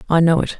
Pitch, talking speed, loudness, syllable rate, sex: 165 Hz, 300 wpm, -16 LUFS, 7.7 syllables/s, female